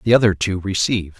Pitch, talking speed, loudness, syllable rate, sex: 100 Hz, 200 wpm, -18 LUFS, 6.6 syllables/s, male